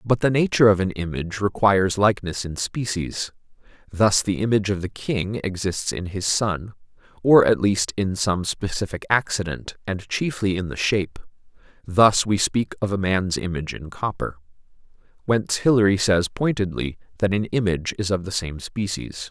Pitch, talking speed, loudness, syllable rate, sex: 100 Hz, 165 wpm, -22 LUFS, 5.1 syllables/s, male